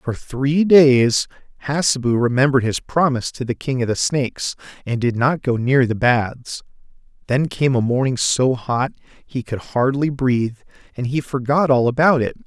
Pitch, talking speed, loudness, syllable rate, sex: 130 Hz, 175 wpm, -18 LUFS, 4.7 syllables/s, male